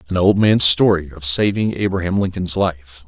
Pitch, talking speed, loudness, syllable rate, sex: 90 Hz, 175 wpm, -16 LUFS, 4.9 syllables/s, male